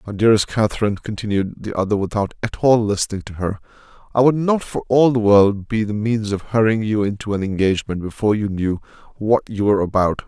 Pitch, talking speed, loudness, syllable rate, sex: 105 Hz, 205 wpm, -19 LUFS, 6.1 syllables/s, male